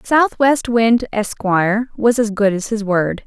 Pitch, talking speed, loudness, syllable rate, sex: 220 Hz, 165 wpm, -16 LUFS, 4.0 syllables/s, female